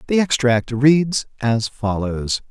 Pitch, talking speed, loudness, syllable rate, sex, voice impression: 130 Hz, 120 wpm, -19 LUFS, 3.3 syllables/s, male, masculine, adult-like, tensed, powerful, bright, clear, fluent, intellectual, friendly, wild, lively, slightly intense